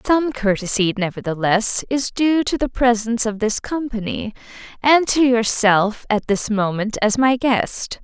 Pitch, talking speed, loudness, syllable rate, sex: 230 Hz, 150 wpm, -18 LUFS, 4.3 syllables/s, female